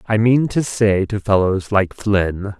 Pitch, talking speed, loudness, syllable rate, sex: 105 Hz, 185 wpm, -17 LUFS, 3.7 syllables/s, male